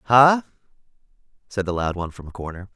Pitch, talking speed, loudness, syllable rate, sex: 105 Hz, 175 wpm, -22 LUFS, 6.8 syllables/s, male